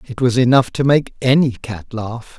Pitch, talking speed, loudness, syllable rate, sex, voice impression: 120 Hz, 200 wpm, -16 LUFS, 4.6 syllables/s, male, masculine, adult-like, tensed, powerful, bright, clear, cool, intellectual, calm, friendly, wild, lively, kind